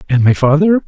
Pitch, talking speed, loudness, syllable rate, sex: 155 Hz, 205 wpm, -12 LUFS, 5.9 syllables/s, male